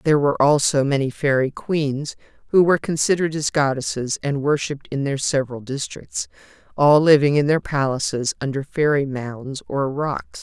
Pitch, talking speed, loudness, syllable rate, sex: 140 Hz, 155 wpm, -20 LUFS, 5.1 syllables/s, female